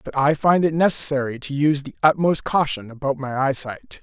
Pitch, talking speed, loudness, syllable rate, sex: 145 Hz, 195 wpm, -20 LUFS, 5.4 syllables/s, male